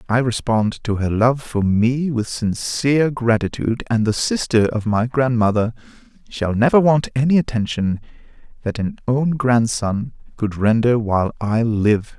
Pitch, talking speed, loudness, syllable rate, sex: 120 Hz, 150 wpm, -19 LUFS, 4.4 syllables/s, male